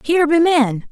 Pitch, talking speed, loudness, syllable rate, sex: 295 Hz, 195 wpm, -15 LUFS, 4.9 syllables/s, female